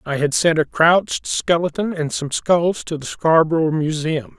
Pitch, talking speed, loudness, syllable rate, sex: 160 Hz, 180 wpm, -18 LUFS, 4.5 syllables/s, male